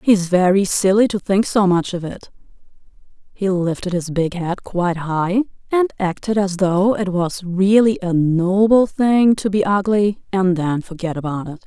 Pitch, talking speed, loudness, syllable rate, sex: 190 Hz, 180 wpm, -18 LUFS, 4.5 syllables/s, female